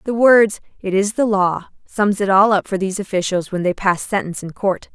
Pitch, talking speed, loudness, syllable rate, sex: 195 Hz, 230 wpm, -17 LUFS, 5.4 syllables/s, female